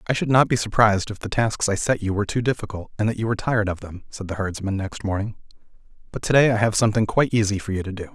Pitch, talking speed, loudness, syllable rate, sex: 105 Hz, 280 wpm, -22 LUFS, 7.2 syllables/s, male